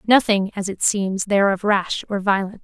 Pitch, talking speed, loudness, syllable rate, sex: 200 Hz, 205 wpm, -20 LUFS, 5.0 syllables/s, female